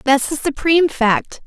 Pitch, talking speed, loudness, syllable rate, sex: 285 Hz, 165 wpm, -16 LUFS, 4.5 syllables/s, female